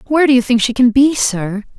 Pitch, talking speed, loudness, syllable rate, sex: 245 Hz, 270 wpm, -13 LUFS, 6.0 syllables/s, female